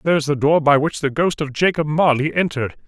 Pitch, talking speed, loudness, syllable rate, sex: 150 Hz, 230 wpm, -18 LUFS, 6.0 syllables/s, male